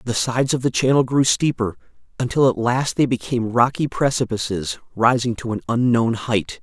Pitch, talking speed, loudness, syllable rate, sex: 120 Hz, 170 wpm, -20 LUFS, 5.3 syllables/s, male